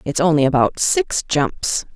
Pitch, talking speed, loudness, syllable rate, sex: 165 Hz, 155 wpm, -18 LUFS, 3.9 syllables/s, female